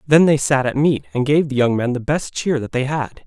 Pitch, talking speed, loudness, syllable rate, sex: 140 Hz, 295 wpm, -18 LUFS, 5.3 syllables/s, male